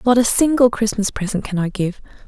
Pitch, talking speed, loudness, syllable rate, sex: 220 Hz, 210 wpm, -18 LUFS, 5.7 syllables/s, female